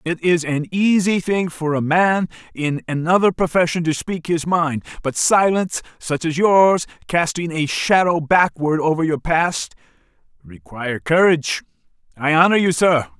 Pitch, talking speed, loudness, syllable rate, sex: 165 Hz, 150 wpm, -18 LUFS, 4.5 syllables/s, male